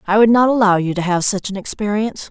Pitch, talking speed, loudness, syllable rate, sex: 205 Hz, 260 wpm, -16 LUFS, 6.5 syllables/s, female